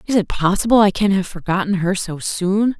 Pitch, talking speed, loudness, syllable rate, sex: 195 Hz, 215 wpm, -18 LUFS, 5.3 syllables/s, female